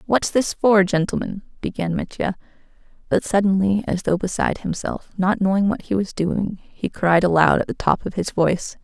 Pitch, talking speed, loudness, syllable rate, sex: 195 Hz, 185 wpm, -21 LUFS, 5.1 syllables/s, female